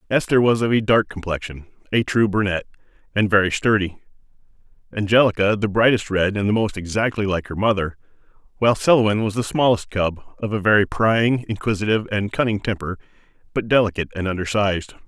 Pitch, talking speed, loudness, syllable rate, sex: 105 Hz, 165 wpm, -20 LUFS, 6.1 syllables/s, male